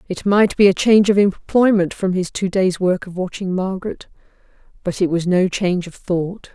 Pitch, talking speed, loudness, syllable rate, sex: 190 Hz, 200 wpm, -18 LUFS, 5.1 syllables/s, female